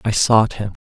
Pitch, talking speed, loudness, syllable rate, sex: 110 Hz, 220 wpm, -16 LUFS, 4.5 syllables/s, male